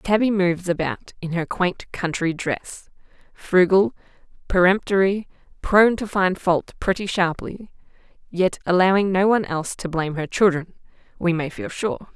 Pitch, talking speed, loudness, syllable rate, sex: 185 Hz, 145 wpm, -21 LUFS, 4.8 syllables/s, female